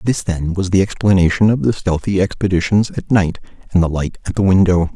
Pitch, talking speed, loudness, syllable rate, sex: 95 Hz, 205 wpm, -16 LUFS, 5.6 syllables/s, male